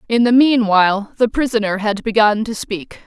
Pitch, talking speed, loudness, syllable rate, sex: 220 Hz, 175 wpm, -16 LUFS, 5.0 syllables/s, female